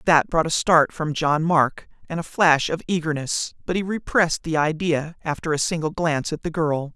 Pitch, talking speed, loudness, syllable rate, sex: 160 Hz, 205 wpm, -22 LUFS, 5.1 syllables/s, male